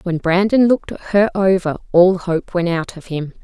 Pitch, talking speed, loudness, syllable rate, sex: 180 Hz, 190 wpm, -17 LUFS, 4.9 syllables/s, female